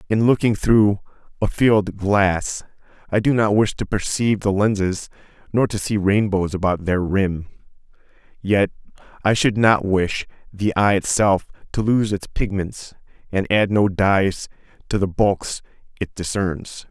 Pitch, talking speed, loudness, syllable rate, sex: 100 Hz, 150 wpm, -20 LUFS, 4.2 syllables/s, male